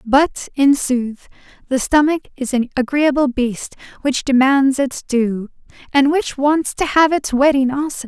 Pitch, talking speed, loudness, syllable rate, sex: 270 Hz, 155 wpm, -17 LUFS, 4.1 syllables/s, female